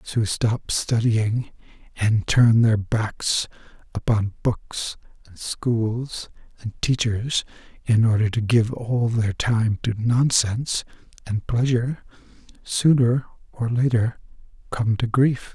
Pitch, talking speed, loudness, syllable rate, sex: 115 Hz, 120 wpm, -22 LUFS, 3.6 syllables/s, male